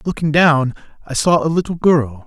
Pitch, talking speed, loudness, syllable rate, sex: 150 Hz, 185 wpm, -16 LUFS, 5.0 syllables/s, male